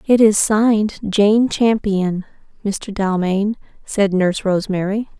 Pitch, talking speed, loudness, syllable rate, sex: 205 Hz, 115 wpm, -17 LUFS, 4.0 syllables/s, female